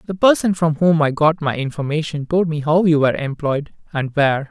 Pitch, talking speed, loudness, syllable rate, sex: 155 Hz, 215 wpm, -18 LUFS, 5.5 syllables/s, male